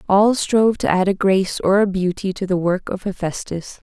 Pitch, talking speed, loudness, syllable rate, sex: 190 Hz, 215 wpm, -19 LUFS, 5.2 syllables/s, female